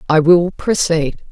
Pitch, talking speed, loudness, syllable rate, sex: 165 Hz, 135 wpm, -14 LUFS, 3.9 syllables/s, female